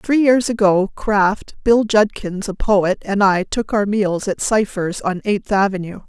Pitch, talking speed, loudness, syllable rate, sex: 205 Hz, 180 wpm, -17 LUFS, 4.1 syllables/s, female